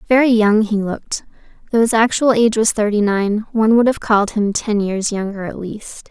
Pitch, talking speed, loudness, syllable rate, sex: 215 Hz, 205 wpm, -16 LUFS, 5.4 syllables/s, female